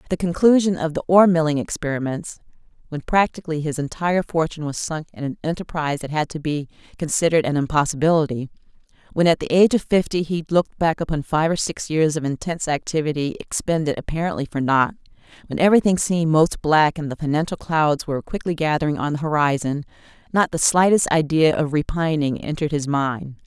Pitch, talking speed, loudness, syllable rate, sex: 160 Hz, 180 wpm, -21 LUFS, 6.2 syllables/s, female